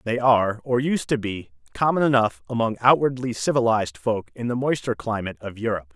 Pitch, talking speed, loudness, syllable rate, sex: 120 Hz, 180 wpm, -23 LUFS, 6.0 syllables/s, male